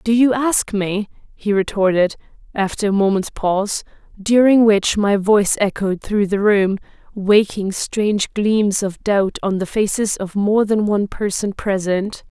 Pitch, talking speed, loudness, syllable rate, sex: 205 Hz, 155 wpm, -18 LUFS, 4.2 syllables/s, female